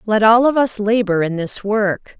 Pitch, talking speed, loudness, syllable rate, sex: 210 Hz, 220 wpm, -16 LUFS, 4.4 syllables/s, female